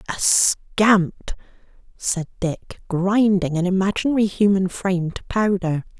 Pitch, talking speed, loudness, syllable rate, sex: 190 Hz, 110 wpm, -20 LUFS, 4.1 syllables/s, female